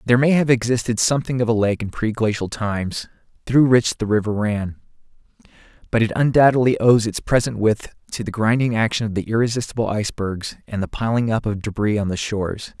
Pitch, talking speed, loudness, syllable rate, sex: 110 Hz, 190 wpm, -20 LUFS, 5.9 syllables/s, male